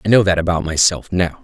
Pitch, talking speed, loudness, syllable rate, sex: 90 Hz, 250 wpm, -16 LUFS, 6.1 syllables/s, male